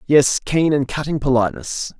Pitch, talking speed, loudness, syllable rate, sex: 140 Hz, 150 wpm, -18 LUFS, 4.9 syllables/s, male